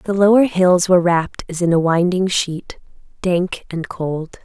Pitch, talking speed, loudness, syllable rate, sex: 180 Hz, 175 wpm, -17 LUFS, 4.4 syllables/s, female